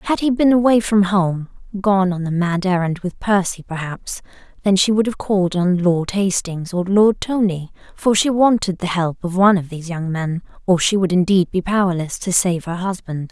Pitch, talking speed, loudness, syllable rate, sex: 185 Hz, 205 wpm, -18 LUFS, 5.0 syllables/s, female